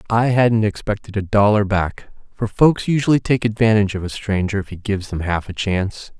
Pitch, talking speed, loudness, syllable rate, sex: 105 Hz, 205 wpm, -19 LUFS, 5.6 syllables/s, male